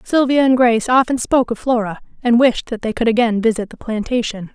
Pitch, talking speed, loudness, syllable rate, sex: 235 Hz, 210 wpm, -17 LUFS, 5.9 syllables/s, female